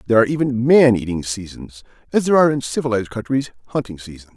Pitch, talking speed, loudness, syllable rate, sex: 120 Hz, 195 wpm, -18 LUFS, 7.4 syllables/s, male